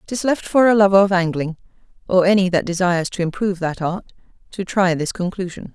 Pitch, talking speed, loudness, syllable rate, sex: 185 Hz, 200 wpm, -18 LUFS, 6.1 syllables/s, female